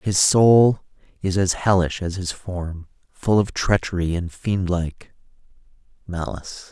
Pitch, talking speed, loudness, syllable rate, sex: 90 Hz, 135 wpm, -21 LUFS, 3.9 syllables/s, male